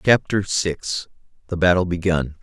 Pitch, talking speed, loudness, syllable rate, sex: 90 Hz, 100 wpm, -21 LUFS, 4.3 syllables/s, male